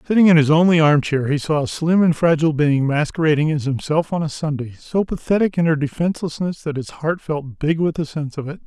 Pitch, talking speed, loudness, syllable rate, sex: 155 Hz, 235 wpm, -19 LUFS, 6.0 syllables/s, male